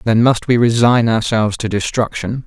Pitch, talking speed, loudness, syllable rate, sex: 115 Hz, 170 wpm, -15 LUFS, 5.1 syllables/s, male